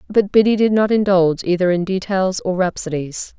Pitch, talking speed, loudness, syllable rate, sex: 190 Hz, 175 wpm, -17 LUFS, 5.3 syllables/s, female